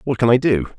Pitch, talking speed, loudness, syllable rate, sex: 115 Hz, 305 wpm, -17 LUFS, 6.5 syllables/s, male